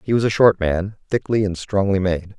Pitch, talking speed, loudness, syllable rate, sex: 100 Hz, 225 wpm, -19 LUFS, 5.1 syllables/s, male